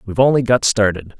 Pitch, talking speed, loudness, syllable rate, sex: 110 Hz, 200 wpm, -15 LUFS, 6.6 syllables/s, male